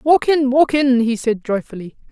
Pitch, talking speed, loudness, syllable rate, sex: 255 Hz, 200 wpm, -16 LUFS, 4.6 syllables/s, female